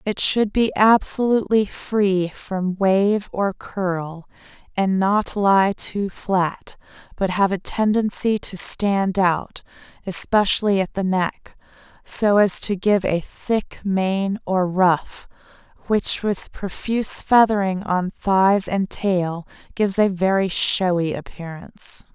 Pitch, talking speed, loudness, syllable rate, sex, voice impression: 195 Hz, 125 wpm, -20 LUFS, 3.5 syllables/s, female, feminine, adult-like, soft, slightly muffled, calm, friendly, reassuring, slightly elegant, slightly sweet